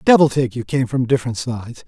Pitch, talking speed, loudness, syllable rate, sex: 125 Hz, 225 wpm, -19 LUFS, 6.3 syllables/s, male